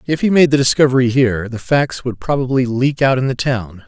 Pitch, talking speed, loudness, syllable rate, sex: 130 Hz, 230 wpm, -15 LUFS, 5.6 syllables/s, male